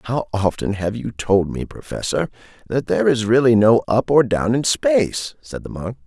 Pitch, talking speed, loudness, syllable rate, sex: 120 Hz, 200 wpm, -19 LUFS, 4.8 syllables/s, male